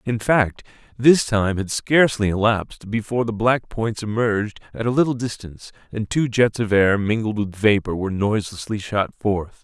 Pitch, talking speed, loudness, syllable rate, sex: 110 Hz, 175 wpm, -20 LUFS, 5.1 syllables/s, male